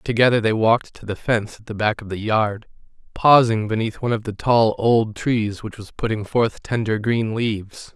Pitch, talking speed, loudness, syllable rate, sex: 110 Hz, 205 wpm, -20 LUFS, 5.0 syllables/s, male